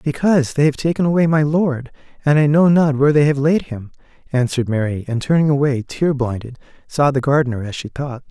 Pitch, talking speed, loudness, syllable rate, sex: 140 Hz, 210 wpm, -17 LUFS, 5.9 syllables/s, male